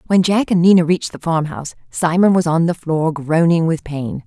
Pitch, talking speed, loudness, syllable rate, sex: 165 Hz, 210 wpm, -16 LUFS, 5.3 syllables/s, female